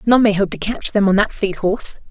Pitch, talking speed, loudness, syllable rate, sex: 205 Hz, 285 wpm, -17 LUFS, 5.7 syllables/s, female